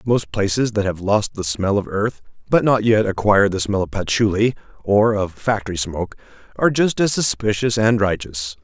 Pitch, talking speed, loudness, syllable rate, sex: 105 Hz, 175 wpm, -19 LUFS, 5.2 syllables/s, male